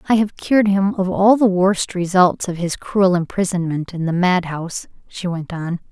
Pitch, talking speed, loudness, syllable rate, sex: 185 Hz, 205 wpm, -18 LUFS, 4.8 syllables/s, female